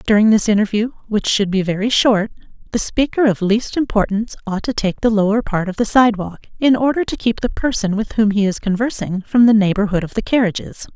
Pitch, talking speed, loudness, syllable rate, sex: 215 Hz, 220 wpm, -17 LUFS, 5.8 syllables/s, female